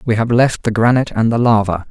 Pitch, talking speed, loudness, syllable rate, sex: 115 Hz, 250 wpm, -14 LUFS, 6.2 syllables/s, male